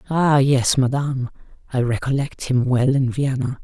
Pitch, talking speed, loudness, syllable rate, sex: 130 Hz, 150 wpm, -20 LUFS, 4.7 syllables/s, female